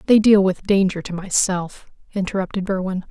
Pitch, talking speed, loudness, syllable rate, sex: 190 Hz, 155 wpm, -19 LUFS, 5.3 syllables/s, female